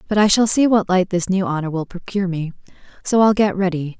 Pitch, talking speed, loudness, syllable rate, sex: 190 Hz, 225 wpm, -18 LUFS, 6.1 syllables/s, female